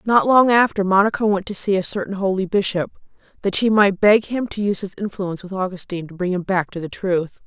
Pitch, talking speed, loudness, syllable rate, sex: 195 Hz, 235 wpm, -19 LUFS, 6.0 syllables/s, female